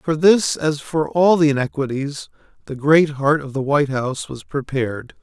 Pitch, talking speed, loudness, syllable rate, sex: 145 Hz, 185 wpm, -19 LUFS, 4.8 syllables/s, male